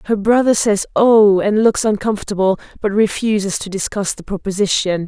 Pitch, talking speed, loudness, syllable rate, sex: 205 Hz, 155 wpm, -16 LUFS, 5.2 syllables/s, female